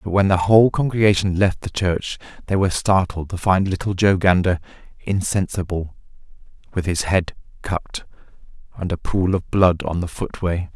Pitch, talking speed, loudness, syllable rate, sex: 95 Hz, 160 wpm, -20 LUFS, 5.0 syllables/s, male